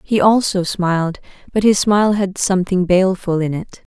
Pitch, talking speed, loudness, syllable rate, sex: 190 Hz, 165 wpm, -16 LUFS, 5.2 syllables/s, female